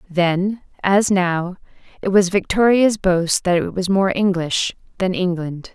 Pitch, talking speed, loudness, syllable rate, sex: 185 Hz, 145 wpm, -18 LUFS, 3.8 syllables/s, female